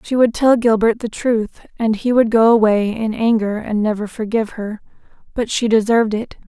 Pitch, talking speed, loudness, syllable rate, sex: 220 Hz, 195 wpm, -17 LUFS, 5.1 syllables/s, female